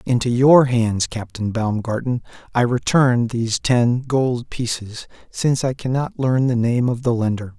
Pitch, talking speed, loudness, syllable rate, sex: 120 Hz, 160 wpm, -19 LUFS, 4.4 syllables/s, male